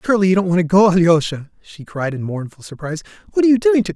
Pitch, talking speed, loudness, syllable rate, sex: 170 Hz, 275 wpm, -16 LUFS, 7.5 syllables/s, male